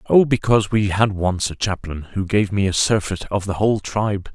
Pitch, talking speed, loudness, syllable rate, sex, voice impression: 100 Hz, 220 wpm, -20 LUFS, 5.4 syllables/s, male, very masculine, very adult-like, very thick, tensed, very powerful, slightly bright, hard, muffled, slightly halting, very cool, very intellectual, sincere, calm, very mature, very friendly, very reassuring, unique, slightly elegant, very wild, slightly sweet, slightly lively, kind